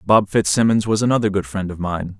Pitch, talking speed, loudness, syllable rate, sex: 100 Hz, 220 wpm, -18 LUFS, 5.7 syllables/s, male